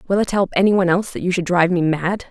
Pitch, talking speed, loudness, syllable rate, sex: 185 Hz, 310 wpm, -18 LUFS, 7.9 syllables/s, female